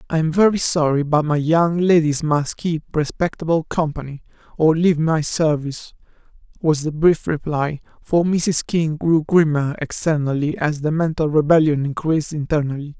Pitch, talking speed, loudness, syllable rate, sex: 155 Hz, 145 wpm, -19 LUFS, 4.8 syllables/s, male